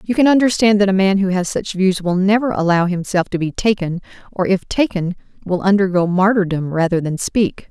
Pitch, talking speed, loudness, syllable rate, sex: 190 Hz, 205 wpm, -17 LUFS, 5.4 syllables/s, female